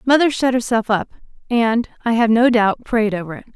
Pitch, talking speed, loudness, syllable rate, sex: 230 Hz, 205 wpm, -17 LUFS, 5.2 syllables/s, female